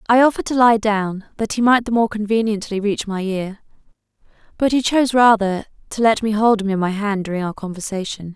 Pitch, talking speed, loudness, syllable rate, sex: 210 Hz, 210 wpm, -18 LUFS, 5.8 syllables/s, female